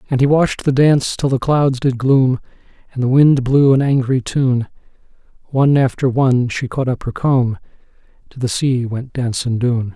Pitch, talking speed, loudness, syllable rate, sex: 130 Hz, 185 wpm, -16 LUFS, 4.9 syllables/s, male